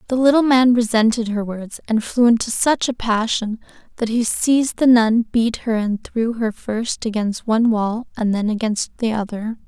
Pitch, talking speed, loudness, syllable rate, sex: 230 Hz, 190 wpm, -18 LUFS, 4.7 syllables/s, female